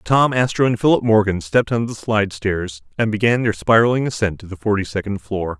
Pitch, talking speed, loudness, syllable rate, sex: 105 Hz, 205 wpm, -18 LUFS, 5.8 syllables/s, male